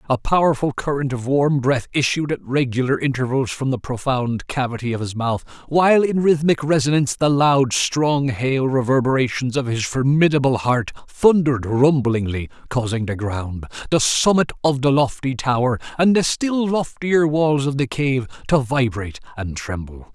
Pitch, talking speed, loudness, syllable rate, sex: 135 Hz, 160 wpm, -19 LUFS, 4.8 syllables/s, male